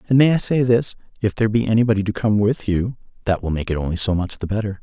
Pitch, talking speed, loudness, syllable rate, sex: 105 Hz, 275 wpm, -20 LUFS, 6.8 syllables/s, male